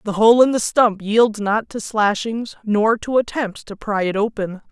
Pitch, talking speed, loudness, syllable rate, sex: 215 Hz, 205 wpm, -18 LUFS, 4.3 syllables/s, female